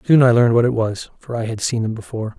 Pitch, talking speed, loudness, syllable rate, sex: 115 Hz, 300 wpm, -18 LUFS, 6.9 syllables/s, male